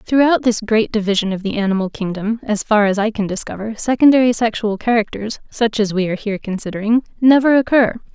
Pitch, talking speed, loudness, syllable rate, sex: 220 Hz, 185 wpm, -17 LUFS, 6.0 syllables/s, female